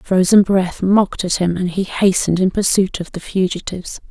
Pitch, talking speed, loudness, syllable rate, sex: 185 Hz, 205 wpm, -16 LUFS, 5.5 syllables/s, female